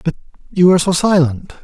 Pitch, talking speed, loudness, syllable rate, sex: 170 Hz, 185 wpm, -14 LUFS, 6.4 syllables/s, male